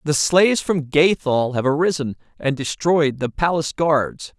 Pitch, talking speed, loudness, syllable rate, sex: 150 Hz, 150 wpm, -19 LUFS, 4.5 syllables/s, male